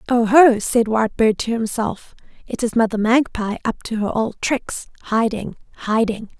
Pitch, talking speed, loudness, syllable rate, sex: 225 Hz, 150 wpm, -19 LUFS, 4.6 syllables/s, female